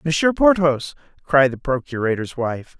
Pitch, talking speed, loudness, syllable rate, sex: 145 Hz, 130 wpm, -19 LUFS, 4.6 syllables/s, male